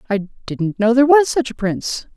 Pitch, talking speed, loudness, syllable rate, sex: 235 Hz, 220 wpm, -17 LUFS, 5.3 syllables/s, female